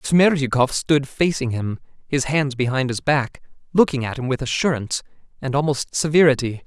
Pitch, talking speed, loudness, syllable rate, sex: 135 Hz, 155 wpm, -20 LUFS, 5.2 syllables/s, male